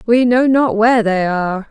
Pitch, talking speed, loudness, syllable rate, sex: 220 Hz, 210 wpm, -14 LUFS, 5.1 syllables/s, female